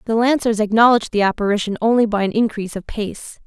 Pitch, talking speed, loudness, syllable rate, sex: 215 Hz, 190 wpm, -18 LUFS, 6.5 syllables/s, female